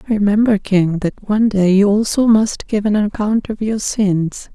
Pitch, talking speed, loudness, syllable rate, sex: 205 Hz, 185 wpm, -16 LUFS, 4.4 syllables/s, female